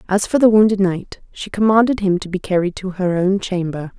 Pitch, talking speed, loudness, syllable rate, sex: 190 Hz, 225 wpm, -17 LUFS, 5.4 syllables/s, female